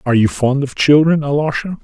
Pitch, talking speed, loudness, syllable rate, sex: 140 Hz, 195 wpm, -14 LUFS, 5.9 syllables/s, male